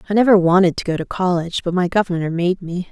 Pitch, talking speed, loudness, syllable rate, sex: 180 Hz, 245 wpm, -18 LUFS, 6.8 syllables/s, female